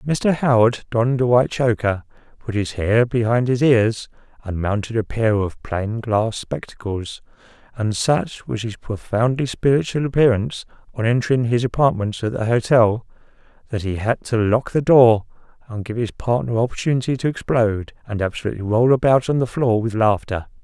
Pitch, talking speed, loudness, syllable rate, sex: 115 Hz, 165 wpm, -19 LUFS, 5.1 syllables/s, male